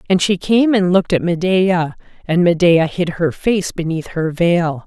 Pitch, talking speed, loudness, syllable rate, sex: 175 Hz, 185 wpm, -16 LUFS, 4.3 syllables/s, female